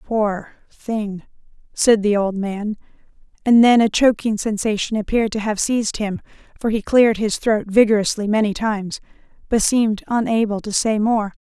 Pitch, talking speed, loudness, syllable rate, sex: 215 Hz, 155 wpm, -18 LUFS, 5.0 syllables/s, female